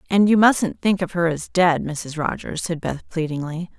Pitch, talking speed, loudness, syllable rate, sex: 170 Hz, 205 wpm, -21 LUFS, 4.6 syllables/s, female